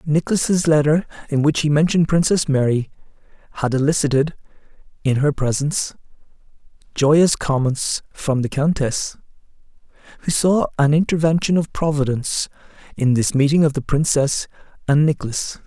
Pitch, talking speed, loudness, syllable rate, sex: 145 Hz, 125 wpm, -19 LUFS, 5.2 syllables/s, male